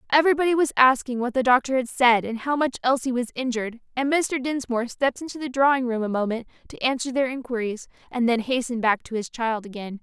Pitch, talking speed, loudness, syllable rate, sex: 250 Hz, 215 wpm, -23 LUFS, 6.3 syllables/s, female